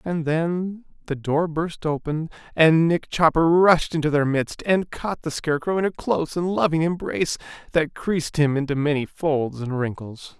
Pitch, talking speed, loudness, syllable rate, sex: 160 Hz, 180 wpm, -22 LUFS, 4.7 syllables/s, male